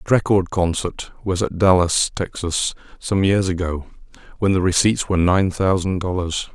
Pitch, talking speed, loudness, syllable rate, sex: 90 Hz, 155 wpm, -19 LUFS, 4.8 syllables/s, male